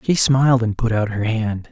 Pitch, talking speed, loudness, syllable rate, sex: 115 Hz, 245 wpm, -18 LUFS, 5.0 syllables/s, male